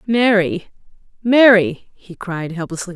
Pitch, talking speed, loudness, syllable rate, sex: 195 Hz, 100 wpm, -16 LUFS, 3.8 syllables/s, female